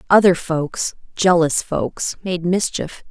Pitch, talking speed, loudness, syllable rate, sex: 170 Hz, 75 wpm, -19 LUFS, 3.5 syllables/s, female